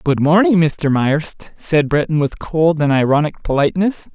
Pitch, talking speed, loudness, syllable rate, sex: 155 Hz, 160 wpm, -16 LUFS, 4.5 syllables/s, male